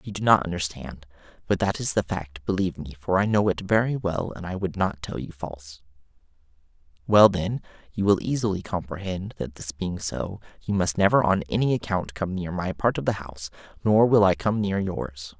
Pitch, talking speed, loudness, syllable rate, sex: 90 Hz, 205 wpm, -25 LUFS, 5.3 syllables/s, male